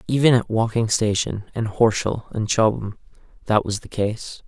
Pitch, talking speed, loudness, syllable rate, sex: 110 Hz, 160 wpm, -21 LUFS, 4.6 syllables/s, male